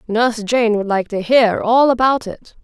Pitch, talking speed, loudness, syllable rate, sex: 225 Hz, 205 wpm, -16 LUFS, 4.5 syllables/s, female